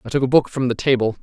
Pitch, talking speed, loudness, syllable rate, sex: 130 Hz, 345 wpm, -18 LUFS, 7.3 syllables/s, male